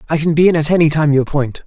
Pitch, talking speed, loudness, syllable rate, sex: 155 Hz, 325 wpm, -14 LUFS, 7.4 syllables/s, male